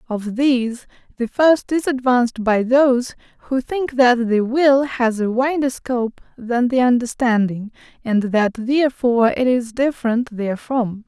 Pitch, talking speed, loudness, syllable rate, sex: 245 Hz, 145 wpm, -18 LUFS, 4.4 syllables/s, female